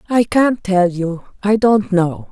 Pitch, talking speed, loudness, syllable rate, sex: 195 Hz, 180 wpm, -16 LUFS, 3.5 syllables/s, female